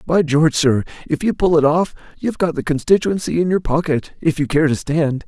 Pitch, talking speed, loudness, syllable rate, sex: 155 Hz, 230 wpm, -18 LUFS, 5.7 syllables/s, male